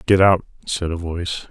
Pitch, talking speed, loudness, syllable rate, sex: 85 Hz, 200 wpm, -20 LUFS, 5.2 syllables/s, male